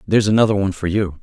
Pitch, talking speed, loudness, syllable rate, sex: 100 Hz, 245 wpm, -17 LUFS, 8.3 syllables/s, male